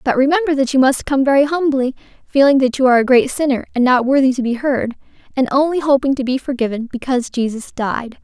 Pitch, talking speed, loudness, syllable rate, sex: 265 Hz, 220 wpm, -16 LUFS, 6.2 syllables/s, female